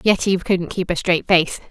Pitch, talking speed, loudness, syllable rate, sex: 180 Hz, 210 wpm, -18 LUFS, 5.2 syllables/s, female